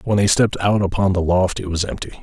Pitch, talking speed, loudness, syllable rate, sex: 95 Hz, 270 wpm, -18 LUFS, 6.4 syllables/s, male